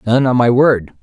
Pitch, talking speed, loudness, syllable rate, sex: 125 Hz, 235 wpm, -13 LUFS, 4.9 syllables/s, male